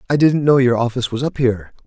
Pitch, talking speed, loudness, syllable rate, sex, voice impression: 130 Hz, 260 wpm, -16 LUFS, 7.0 syllables/s, male, very masculine, very adult-like, thick, cool, sincere, calm, slightly wild, slightly sweet